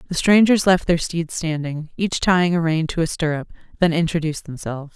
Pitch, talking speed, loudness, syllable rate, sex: 165 Hz, 195 wpm, -20 LUFS, 5.8 syllables/s, female